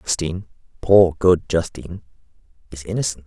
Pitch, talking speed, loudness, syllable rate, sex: 85 Hz, 110 wpm, -19 LUFS, 5.7 syllables/s, male